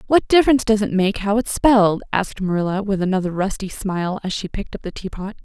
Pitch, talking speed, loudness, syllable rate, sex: 200 Hz, 220 wpm, -19 LUFS, 6.5 syllables/s, female